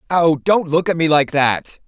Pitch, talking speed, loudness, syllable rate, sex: 155 Hz, 225 wpm, -16 LUFS, 4.3 syllables/s, male